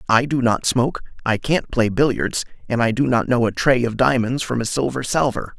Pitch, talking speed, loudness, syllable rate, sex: 120 Hz, 225 wpm, -19 LUFS, 5.3 syllables/s, male